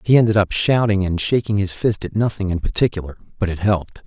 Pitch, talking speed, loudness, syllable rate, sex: 100 Hz, 220 wpm, -19 LUFS, 6.2 syllables/s, male